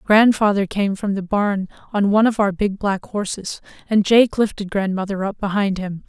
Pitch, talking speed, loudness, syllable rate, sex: 200 Hz, 190 wpm, -19 LUFS, 4.9 syllables/s, female